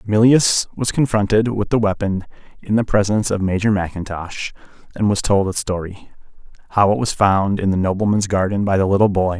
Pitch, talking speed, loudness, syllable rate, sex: 100 Hz, 180 wpm, -18 LUFS, 5.6 syllables/s, male